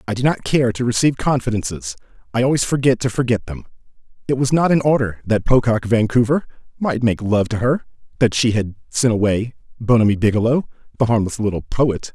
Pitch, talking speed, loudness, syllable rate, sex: 115 Hz, 180 wpm, -18 LUFS, 5.9 syllables/s, male